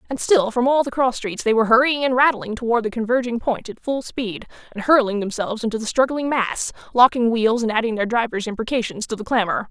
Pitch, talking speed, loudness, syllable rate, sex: 235 Hz, 225 wpm, -20 LUFS, 5.9 syllables/s, female